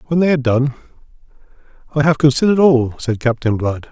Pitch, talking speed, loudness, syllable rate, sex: 135 Hz, 170 wpm, -16 LUFS, 5.9 syllables/s, male